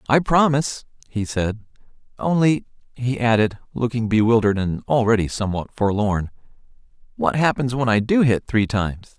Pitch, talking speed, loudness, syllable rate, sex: 115 Hz, 135 wpm, -20 LUFS, 5.3 syllables/s, male